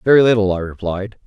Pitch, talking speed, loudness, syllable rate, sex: 105 Hz, 190 wpm, -17 LUFS, 6.3 syllables/s, male